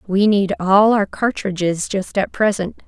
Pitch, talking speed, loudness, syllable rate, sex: 195 Hz, 165 wpm, -17 LUFS, 4.2 syllables/s, female